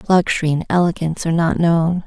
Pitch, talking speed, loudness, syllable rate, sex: 170 Hz, 175 wpm, -17 LUFS, 6.5 syllables/s, female